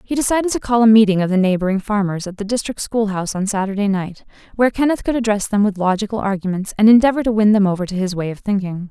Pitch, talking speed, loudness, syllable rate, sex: 205 Hz, 250 wpm, -17 LUFS, 6.9 syllables/s, female